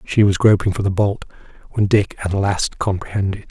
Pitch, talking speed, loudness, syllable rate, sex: 100 Hz, 190 wpm, -18 LUFS, 5.2 syllables/s, male